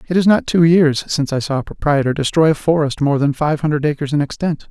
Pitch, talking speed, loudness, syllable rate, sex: 150 Hz, 255 wpm, -16 LUFS, 6.2 syllables/s, male